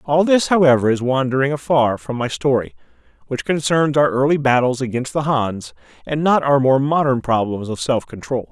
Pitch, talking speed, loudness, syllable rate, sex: 135 Hz, 185 wpm, -18 LUFS, 5.2 syllables/s, male